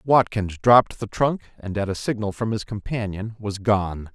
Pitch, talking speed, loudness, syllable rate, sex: 105 Hz, 190 wpm, -23 LUFS, 4.7 syllables/s, male